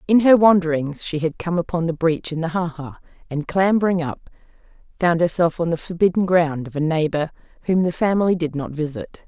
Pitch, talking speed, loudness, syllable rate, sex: 170 Hz, 200 wpm, -20 LUFS, 5.6 syllables/s, female